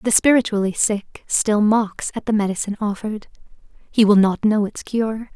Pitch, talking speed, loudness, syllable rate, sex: 210 Hz, 170 wpm, -19 LUFS, 4.9 syllables/s, female